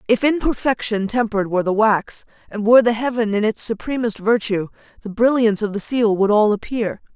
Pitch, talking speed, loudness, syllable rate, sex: 220 Hz, 195 wpm, -18 LUFS, 5.8 syllables/s, female